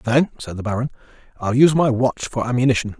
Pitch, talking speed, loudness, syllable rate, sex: 125 Hz, 200 wpm, -19 LUFS, 6.5 syllables/s, male